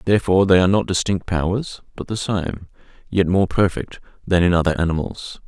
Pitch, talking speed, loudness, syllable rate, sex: 90 Hz, 175 wpm, -19 LUFS, 5.8 syllables/s, male